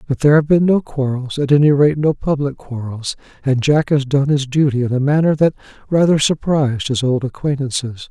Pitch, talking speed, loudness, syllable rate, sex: 140 Hz, 200 wpm, -16 LUFS, 5.5 syllables/s, male